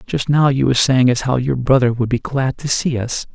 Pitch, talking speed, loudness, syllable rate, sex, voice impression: 130 Hz, 270 wpm, -16 LUFS, 5.1 syllables/s, male, masculine, adult-like, slightly soft, cool, slightly intellectual, calm, kind